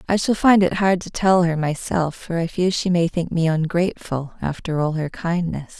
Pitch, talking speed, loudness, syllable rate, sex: 170 Hz, 220 wpm, -20 LUFS, 4.8 syllables/s, female